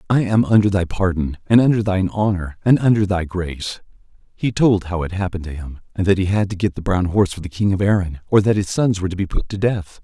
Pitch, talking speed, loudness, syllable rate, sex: 95 Hz, 265 wpm, -19 LUFS, 6.2 syllables/s, male